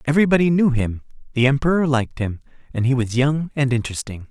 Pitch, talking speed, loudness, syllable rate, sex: 135 Hz, 180 wpm, -20 LUFS, 6.6 syllables/s, male